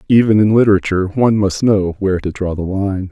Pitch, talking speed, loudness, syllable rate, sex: 100 Hz, 210 wpm, -15 LUFS, 6.2 syllables/s, male